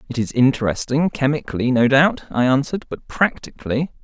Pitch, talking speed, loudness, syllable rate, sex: 135 Hz, 150 wpm, -19 LUFS, 5.8 syllables/s, male